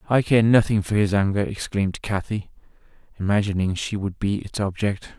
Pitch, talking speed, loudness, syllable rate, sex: 105 Hz, 160 wpm, -22 LUFS, 5.3 syllables/s, male